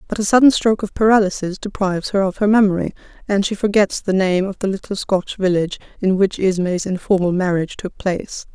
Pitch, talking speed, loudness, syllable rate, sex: 195 Hz, 195 wpm, -18 LUFS, 6.2 syllables/s, female